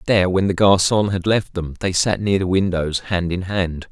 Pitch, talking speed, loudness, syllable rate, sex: 95 Hz, 230 wpm, -19 LUFS, 4.9 syllables/s, male